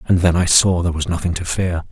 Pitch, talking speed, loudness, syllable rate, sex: 85 Hz, 280 wpm, -17 LUFS, 6.3 syllables/s, male